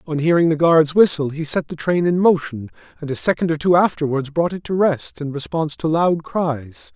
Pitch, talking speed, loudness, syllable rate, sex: 160 Hz, 225 wpm, -18 LUFS, 5.2 syllables/s, male